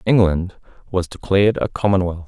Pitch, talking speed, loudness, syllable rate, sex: 95 Hz, 130 wpm, -19 LUFS, 5.5 syllables/s, male